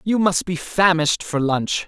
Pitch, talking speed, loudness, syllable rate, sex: 170 Hz, 195 wpm, -19 LUFS, 4.5 syllables/s, male